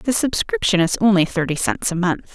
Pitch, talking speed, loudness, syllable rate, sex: 200 Hz, 205 wpm, -19 LUFS, 5.3 syllables/s, female